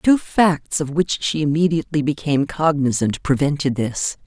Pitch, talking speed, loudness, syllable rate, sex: 150 Hz, 140 wpm, -19 LUFS, 4.8 syllables/s, female